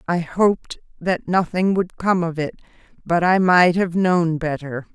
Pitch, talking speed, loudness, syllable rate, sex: 175 Hz, 170 wpm, -19 LUFS, 4.2 syllables/s, female